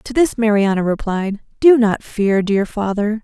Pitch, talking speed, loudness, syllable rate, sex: 215 Hz, 165 wpm, -16 LUFS, 4.3 syllables/s, female